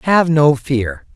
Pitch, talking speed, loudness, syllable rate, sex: 140 Hz, 155 wpm, -15 LUFS, 3.2 syllables/s, male